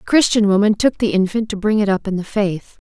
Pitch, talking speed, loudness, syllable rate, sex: 205 Hz, 270 wpm, -17 LUFS, 5.8 syllables/s, female